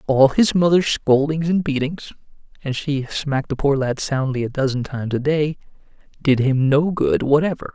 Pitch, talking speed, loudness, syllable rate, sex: 145 Hz, 165 wpm, -19 LUFS, 5.0 syllables/s, male